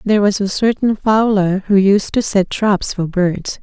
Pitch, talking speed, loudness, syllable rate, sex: 200 Hz, 200 wpm, -15 LUFS, 4.3 syllables/s, female